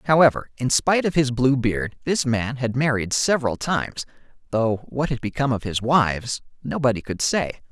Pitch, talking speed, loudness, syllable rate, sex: 125 Hz, 180 wpm, -22 LUFS, 5.3 syllables/s, male